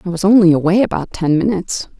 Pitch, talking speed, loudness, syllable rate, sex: 185 Hz, 210 wpm, -14 LUFS, 6.6 syllables/s, female